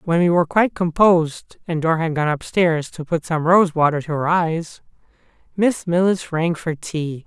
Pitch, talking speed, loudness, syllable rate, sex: 165 Hz, 200 wpm, -19 LUFS, 4.7 syllables/s, male